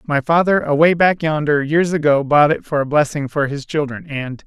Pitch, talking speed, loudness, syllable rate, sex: 150 Hz, 215 wpm, -17 LUFS, 5.1 syllables/s, male